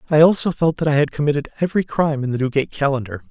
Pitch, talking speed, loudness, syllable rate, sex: 145 Hz, 235 wpm, -19 LUFS, 7.7 syllables/s, male